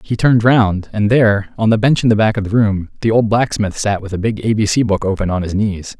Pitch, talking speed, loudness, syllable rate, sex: 105 Hz, 290 wpm, -15 LUFS, 5.9 syllables/s, male